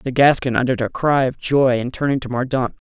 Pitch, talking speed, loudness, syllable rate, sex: 130 Hz, 230 wpm, -18 LUFS, 6.0 syllables/s, male